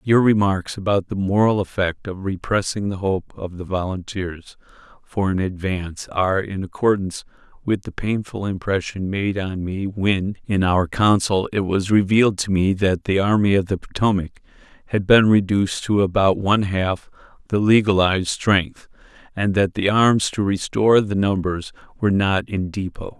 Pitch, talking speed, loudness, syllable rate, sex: 100 Hz, 165 wpm, -20 LUFS, 4.8 syllables/s, male